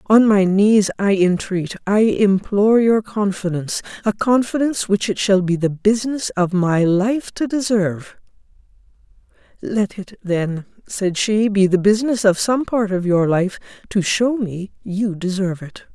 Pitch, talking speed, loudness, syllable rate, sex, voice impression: 200 Hz, 160 wpm, -18 LUFS, 4.4 syllables/s, female, feminine, adult-like, intellectual, slightly elegant, slightly sweet